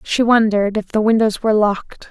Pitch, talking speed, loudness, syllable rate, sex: 215 Hz, 200 wpm, -16 LUFS, 6.0 syllables/s, female